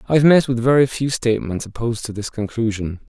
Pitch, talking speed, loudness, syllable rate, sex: 120 Hz, 210 wpm, -19 LUFS, 6.3 syllables/s, male